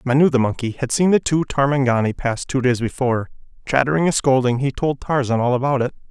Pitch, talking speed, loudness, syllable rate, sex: 130 Hz, 205 wpm, -19 LUFS, 6.1 syllables/s, male